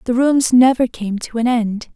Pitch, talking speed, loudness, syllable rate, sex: 240 Hz, 215 wpm, -16 LUFS, 4.4 syllables/s, female